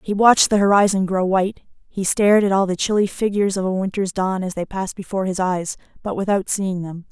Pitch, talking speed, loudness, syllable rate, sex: 190 Hz, 230 wpm, -19 LUFS, 6.2 syllables/s, female